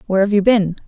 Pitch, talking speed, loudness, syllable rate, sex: 200 Hz, 275 wpm, -15 LUFS, 7.9 syllables/s, female